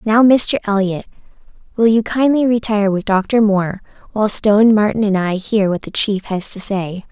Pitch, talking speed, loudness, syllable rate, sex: 210 Hz, 185 wpm, -15 LUFS, 5.1 syllables/s, female